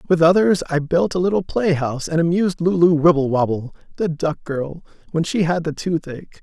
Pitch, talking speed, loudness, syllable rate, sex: 165 Hz, 185 wpm, -19 LUFS, 5.5 syllables/s, male